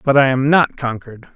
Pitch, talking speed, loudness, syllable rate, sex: 130 Hz, 220 wpm, -15 LUFS, 5.7 syllables/s, male